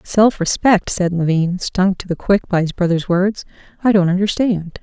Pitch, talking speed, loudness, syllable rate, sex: 185 Hz, 185 wpm, -17 LUFS, 4.6 syllables/s, female